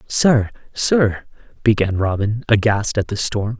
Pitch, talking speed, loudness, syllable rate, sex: 110 Hz, 135 wpm, -18 LUFS, 3.9 syllables/s, male